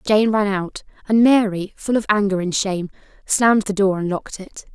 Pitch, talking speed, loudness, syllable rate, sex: 200 Hz, 200 wpm, -19 LUFS, 5.5 syllables/s, female